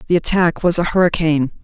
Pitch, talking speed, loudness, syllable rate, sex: 170 Hz, 185 wpm, -16 LUFS, 6.5 syllables/s, female